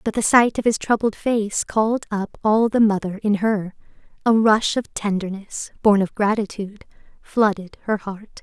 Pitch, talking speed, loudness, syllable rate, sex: 210 Hz, 170 wpm, -20 LUFS, 4.6 syllables/s, female